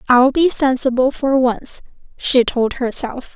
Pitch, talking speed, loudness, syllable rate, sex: 255 Hz, 145 wpm, -16 LUFS, 3.9 syllables/s, female